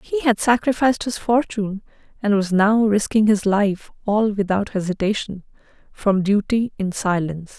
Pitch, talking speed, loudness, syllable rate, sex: 210 Hz, 140 wpm, -20 LUFS, 4.8 syllables/s, female